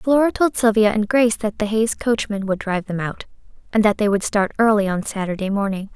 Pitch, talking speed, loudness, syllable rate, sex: 210 Hz, 220 wpm, -19 LUFS, 5.8 syllables/s, female